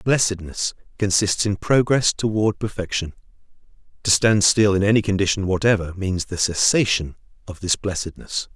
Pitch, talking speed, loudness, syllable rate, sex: 100 Hz, 135 wpm, -20 LUFS, 5.0 syllables/s, male